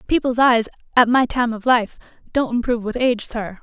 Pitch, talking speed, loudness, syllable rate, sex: 240 Hz, 200 wpm, -19 LUFS, 5.6 syllables/s, female